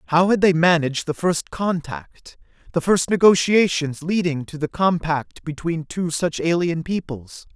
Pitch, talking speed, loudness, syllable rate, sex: 170 Hz, 150 wpm, -20 LUFS, 4.5 syllables/s, male